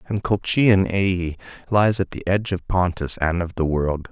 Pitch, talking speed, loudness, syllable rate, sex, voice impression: 90 Hz, 190 wpm, -21 LUFS, 4.8 syllables/s, male, very masculine, very adult-like, slightly old, very thick, slightly relaxed, slightly weak, slightly bright, slightly soft, slightly muffled, fluent, slightly cool, intellectual, sincere, slightly calm, mature, friendly, reassuring, slightly unique, wild, slightly lively, very kind, modest